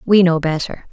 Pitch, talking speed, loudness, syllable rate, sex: 170 Hz, 195 wpm, -16 LUFS, 5.0 syllables/s, female